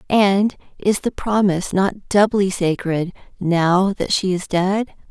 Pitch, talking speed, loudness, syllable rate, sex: 190 Hz, 140 wpm, -19 LUFS, 3.7 syllables/s, female